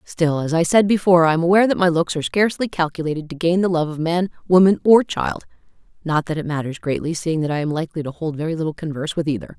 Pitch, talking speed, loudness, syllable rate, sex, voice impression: 160 Hz, 250 wpm, -19 LUFS, 6.9 syllables/s, female, slightly gender-neutral, adult-like, calm